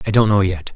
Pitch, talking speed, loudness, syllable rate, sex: 100 Hz, 320 wpm, -17 LUFS, 6.9 syllables/s, male